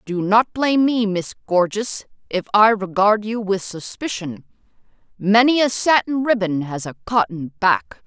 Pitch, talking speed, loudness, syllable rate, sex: 205 Hz, 150 wpm, -19 LUFS, 4.3 syllables/s, female